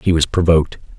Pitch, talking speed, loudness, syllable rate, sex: 80 Hz, 185 wpm, -15 LUFS, 6.4 syllables/s, male